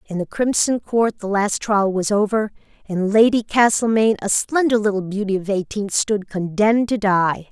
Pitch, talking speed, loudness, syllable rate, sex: 210 Hz, 175 wpm, -19 LUFS, 4.9 syllables/s, female